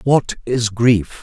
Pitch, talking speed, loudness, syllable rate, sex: 120 Hz, 145 wpm, -17 LUFS, 2.9 syllables/s, male